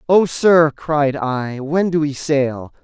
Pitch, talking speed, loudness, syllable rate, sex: 150 Hz, 170 wpm, -17 LUFS, 3.2 syllables/s, male